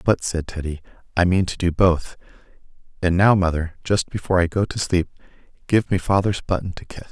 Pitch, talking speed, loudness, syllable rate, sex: 90 Hz, 195 wpm, -21 LUFS, 5.7 syllables/s, male